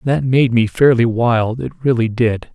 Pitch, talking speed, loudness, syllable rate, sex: 120 Hz, 190 wpm, -15 LUFS, 4.1 syllables/s, male